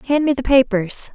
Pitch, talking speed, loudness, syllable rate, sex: 255 Hz, 210 wpm, -17 LUFS, 5.2 syllables/s, female